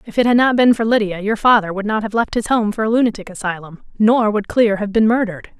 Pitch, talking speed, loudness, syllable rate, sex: 215 Hz, 270 wpm, -16 LUFS, 6.2 syllables/s, female